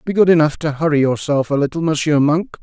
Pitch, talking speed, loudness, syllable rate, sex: 150 Hz, 230 wpm, -16 LUFS, 6.1 syllables/s, male